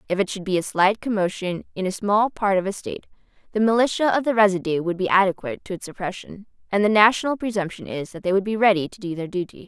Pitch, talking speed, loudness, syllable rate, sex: 195 Hz, 240 wpm, -22 LUFS, 6.6 syllables/s, female